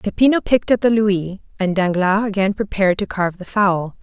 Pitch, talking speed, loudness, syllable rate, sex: 200 Hz, 195 wpm, -18 LUFS, 5.6 syllables/s, female